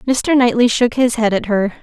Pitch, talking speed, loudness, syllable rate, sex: 235 Hz, 230 wpm, -15 LUFS, 4.9 syllables/s, female